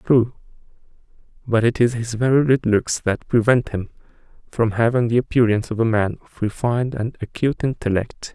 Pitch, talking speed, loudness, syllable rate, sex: 115 Hz, 165 wpm, -20 LUFS, 5.4 syllables/s, male